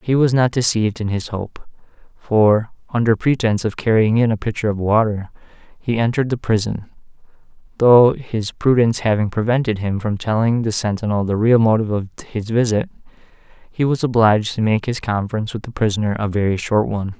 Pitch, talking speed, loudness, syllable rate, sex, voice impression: 110 Hz, 180 wpm, -18 LUFS, 5.7 syllables/s, male, masculine, adult-like, slightly dark, slightly sincere, slightly calm